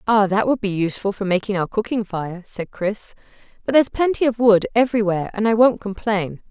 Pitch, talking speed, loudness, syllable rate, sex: 210 Hz, 205 wpm, -20 LUFS, 5.8 syllables/s, female